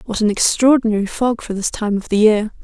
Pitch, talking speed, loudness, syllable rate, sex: 215 Hz, 225 wpm, -16 LUFS, 5.7 syllables/s, female